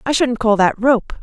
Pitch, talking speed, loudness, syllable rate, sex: 235 Hz, 245 wpm, -16 LUFS, 4.5 syllables/s, female